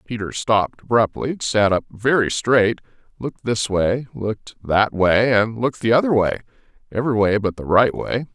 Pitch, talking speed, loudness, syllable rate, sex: 110 Hz, 175 wpm, -19 LUFS, 5.1 syllables/s, male